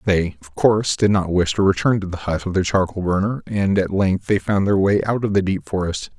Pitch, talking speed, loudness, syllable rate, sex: 95 Hz, 260 wpm, -19 LUFS, 5.4 syllables/s, male